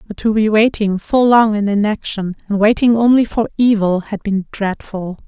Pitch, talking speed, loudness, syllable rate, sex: 210 Hz, 180 wpm, -15 LUFS, 4.8 syllables/s, female